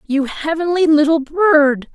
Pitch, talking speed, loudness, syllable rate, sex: 305 Hz, 125 wpm, -15 LUFS, 3.9 syllables/s, female